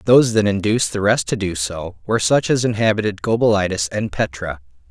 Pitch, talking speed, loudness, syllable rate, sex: 100 Hz, 185 wpm, -18 LUFS, 5.8 syllables/s, male